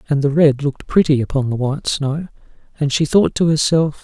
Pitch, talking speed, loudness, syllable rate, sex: 145 Hz, 210 wpm, -17 LUFS, 5.7 syllables/s, male